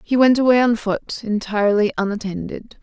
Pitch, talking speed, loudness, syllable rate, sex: 220 Hz, 150 wpm, -19 LUFS, 5.3 syllables/s, female